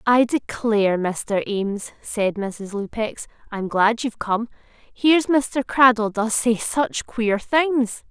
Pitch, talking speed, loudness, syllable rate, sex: 225 Hz, 140 wpm, -21 LUFS, 3.6 syllables/s, female